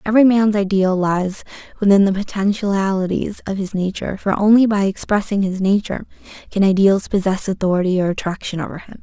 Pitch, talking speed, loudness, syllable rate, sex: 195 Hz, 160 wpm, -18 LUFS, 5.8 syllables/s, female